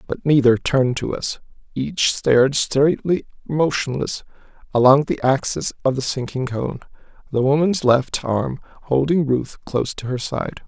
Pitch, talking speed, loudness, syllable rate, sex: 135 Hz, 145 wpm, -20 LUFS, 4.6 syllables/s, male